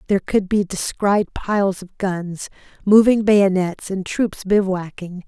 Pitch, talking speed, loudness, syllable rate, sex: 195 Hz, 135 wpm, -19 LUFS, 4.0 syllables/s, female